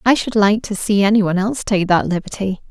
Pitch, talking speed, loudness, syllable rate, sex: 205 Hz, 220 wpm, -17 LUFS, 5.9 syllables/s, female